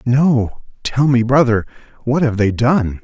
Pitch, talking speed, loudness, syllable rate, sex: 125 Hz, 160 wpm, -16 LUFS, 3.9 syllables/s, male